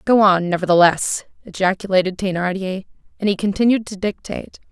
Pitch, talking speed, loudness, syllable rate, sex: 195 Hz, 125 wpm, -18 LUFS, 5.7 syllables/s, female